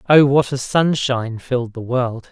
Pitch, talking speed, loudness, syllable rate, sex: 130 Hz, 180 wpm, -18 LUFS, 4.7 syllables/s, male